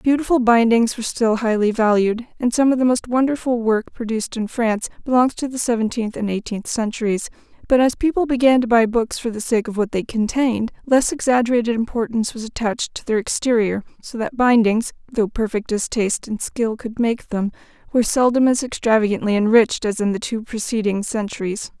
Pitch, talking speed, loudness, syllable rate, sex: 230 Hz, 185 wpm, -19 LUFS, 5.7 syllables/s, female